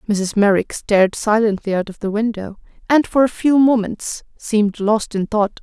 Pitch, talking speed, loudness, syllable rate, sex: 215 Hz, 180 wpm, -17 LUFS, 4.7 syllables/s, female